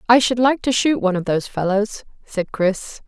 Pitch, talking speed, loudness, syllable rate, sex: 215 Hz, 215 wpm, -19 LUFS, 5.2 syllables/s, female